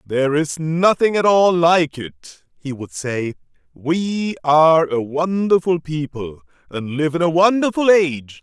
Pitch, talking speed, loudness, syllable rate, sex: 160 Hz, 150 wpm, -17 LUFS, 4.1 syllables/s, male